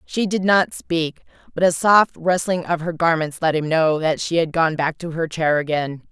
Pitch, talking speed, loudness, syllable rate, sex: 165 Hz, 225 wpm, -19 LUFS, 4.6 syllables/s, female